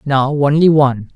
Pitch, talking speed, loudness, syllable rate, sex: 140 Hz, 155 wpm, -13 LUFS, 4.8 syllables/s, male